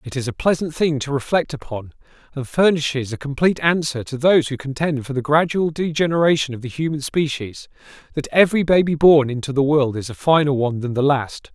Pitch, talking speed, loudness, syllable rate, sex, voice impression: 145 Hz, 205 wpm, -19 LUFS, 5.9 syllables/s, male, masculine, adult-like, bright, clear, fluent, friendly, lively, slightly intense, light